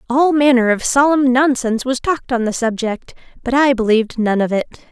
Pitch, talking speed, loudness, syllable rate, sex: 250 Hz, 195 wpm, -16 LUFS, 5.8 syllables/s, female